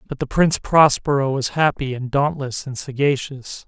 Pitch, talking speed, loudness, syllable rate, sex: 135 Hz, 165 wpm, -19 LUFS, 4.9 syllables/s, male